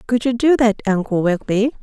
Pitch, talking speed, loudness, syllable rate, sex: 225 Hz, 195 wpm, -17 LUFS, 5.8 syllables/s, female